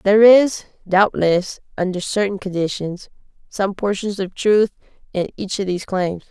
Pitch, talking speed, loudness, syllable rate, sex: 195 Hz, 145 wpm, -19 LUFS, 4.7 syllables/s, female